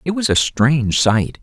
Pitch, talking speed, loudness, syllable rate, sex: 135 Hz, 210 wpm, -16 LUFS, 4.5 syllables/s, male